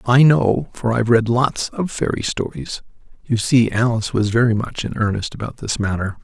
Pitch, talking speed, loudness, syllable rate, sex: 115 Hz, 195 wpm, -19 LUFS, 5.1 syllables/s, male